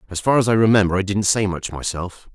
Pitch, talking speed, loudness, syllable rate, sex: 100 Hz, 255 wpm, -19 LUFS, 6.2 syllables/s, male